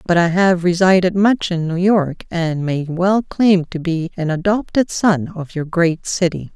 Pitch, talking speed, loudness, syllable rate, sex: 175 Hz, 190 wpm, -17 LUFS, 4.1 syllables/s, female